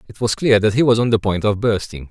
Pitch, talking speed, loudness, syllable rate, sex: 110 Hz, 315 wpm, -17 LUFS, 6.2 syllables/s, male